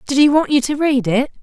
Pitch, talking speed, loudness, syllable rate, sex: 275 Hz, 295 wpm, -15 LUFS, 5.7 syllables/s, female